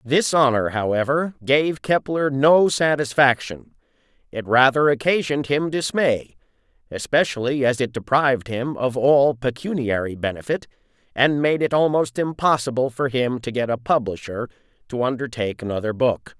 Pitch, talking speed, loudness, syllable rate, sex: 130 Hz, 130 wpm, -20 LUFS, 4.9 syllables/s, male